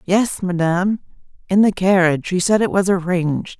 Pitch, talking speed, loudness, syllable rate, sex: 185 Hz, 165 wpm, -17 LUFS, 5.3 syllables/s, female